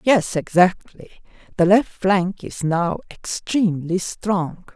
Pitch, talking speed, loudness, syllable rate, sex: 185 Hz, 115 wpm, -20 LUFS, 3.5 syllables/s, female